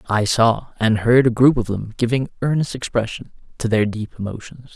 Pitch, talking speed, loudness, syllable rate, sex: 115 Hz, 190 wpm, -19 LUFS, 5.2 syllables/s, male